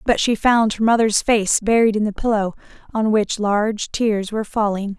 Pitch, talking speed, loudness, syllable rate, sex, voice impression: 215 Hz, 195 wpm, -18 LUFS, 4.9 syllables/s, female, very feminine, slightly young, slightly adult-like, thin, slightly tensed, slightly weak, slightly bright, slightly hard, clear, slightly halting, cute, slightly intellectual, refreshing, very sincere, calm, friendly, reassuring, slightly unique, elegant, sweet, slightly lively, kind, slightly modest